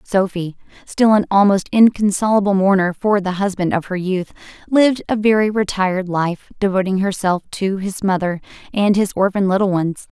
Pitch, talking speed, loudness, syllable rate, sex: 195 Hz, 160 wpm, -17 LUFS, 5.2 syllables/s, female